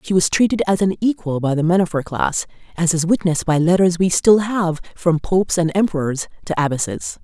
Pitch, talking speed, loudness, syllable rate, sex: 175 Hz, 215 wpm, -18 LUFS, 5.6 syllables/s, female